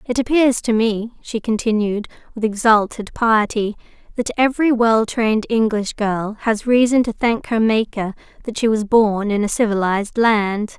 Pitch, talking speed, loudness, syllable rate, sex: 220 Hz, 160 wpm, -18 LUFS, 4.7 syllables/s, female